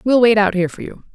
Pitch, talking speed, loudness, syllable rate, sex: 205 Hz, 315 wpm, -15 LUFS, 7.1 syllables/s, female